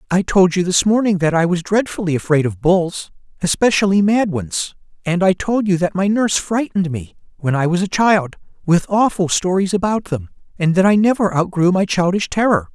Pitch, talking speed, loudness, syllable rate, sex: 185 Hz, 200 wpm, -17 LUFS, 5.3 syllables/s, male